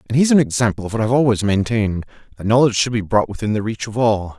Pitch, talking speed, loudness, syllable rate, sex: 110 Hz, 260 wpm, -18 LUFS, 7.1 syllables/s, male